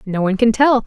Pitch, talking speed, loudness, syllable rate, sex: 225 Hz, 275 wpm, -15 LUFS, 6.5 syllables/s, female